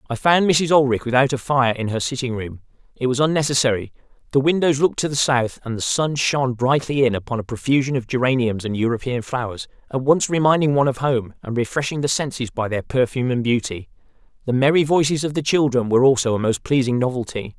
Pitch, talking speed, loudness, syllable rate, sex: 130 Hz, 210 wpm, -20 LUFS, 6.1 syllables/s, male